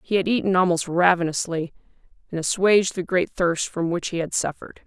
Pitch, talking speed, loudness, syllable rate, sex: 175 Hz, 185 wpm, -22 LUFS, 5.7 syllables/s, female